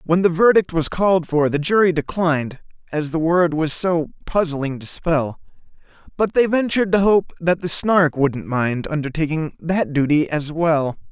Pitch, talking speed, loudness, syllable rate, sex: 165 Hz, 175 wpm, -19 LUFS, 4.6 syllables/s, male